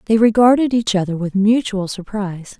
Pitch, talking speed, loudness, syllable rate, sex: 210 Hz, 160 wpm, -17 LUFS, 5.4 syllables/s, female